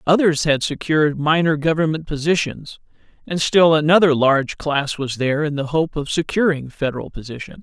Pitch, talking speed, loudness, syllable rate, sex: 150 Hz, 155 wpm, -18 LUFS, 5.4 syllables/s, male